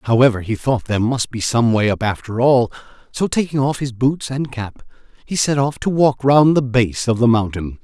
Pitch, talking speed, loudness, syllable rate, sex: 125 Hz, 220 wpm, -17 LUFS, 5.1 syllables/s, male